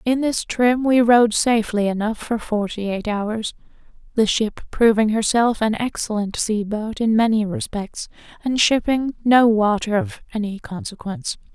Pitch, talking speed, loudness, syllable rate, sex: 220 Hz, 145 wpm, -20 LUFS, 4.5 syllables/s, female